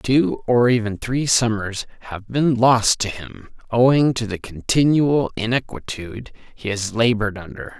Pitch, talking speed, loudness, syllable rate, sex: 115 Hz, 145 wpm, -19 LUFS, 4.2 syllables/s, male